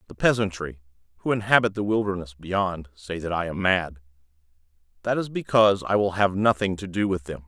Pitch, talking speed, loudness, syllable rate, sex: 95 Hz, 185 wpm, -24 LUFS, 5.7 syllables/s, male